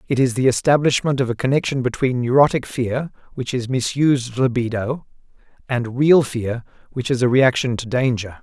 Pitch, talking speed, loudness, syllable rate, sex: 125 Hz, 165 wpm, -19 LUFS, 5.2 syllables/s, male